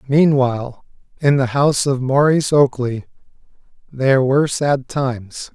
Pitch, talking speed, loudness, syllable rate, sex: 135 Hz, 120 wpm, -17 LUFS, 4.8 syllables/s, male